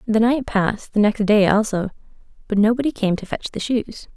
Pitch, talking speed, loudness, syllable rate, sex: 215 Hz, 200 wpm, -19 LUFS, 5.4 syllables/s, female